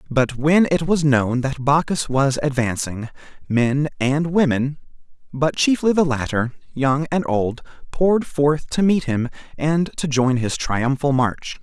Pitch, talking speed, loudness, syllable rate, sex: 140 Hz, 155 wpm, -20 LUFS, 4.0 syllables/s, male